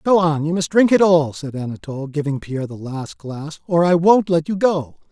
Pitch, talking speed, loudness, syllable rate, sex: 160 Hz, 235 wpm, -18 LUFS, 5.2 syllables/s, male